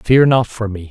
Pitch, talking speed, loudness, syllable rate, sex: 115 Hz, 265 wpm, -15 LUFS, 4.6 syllables/s, male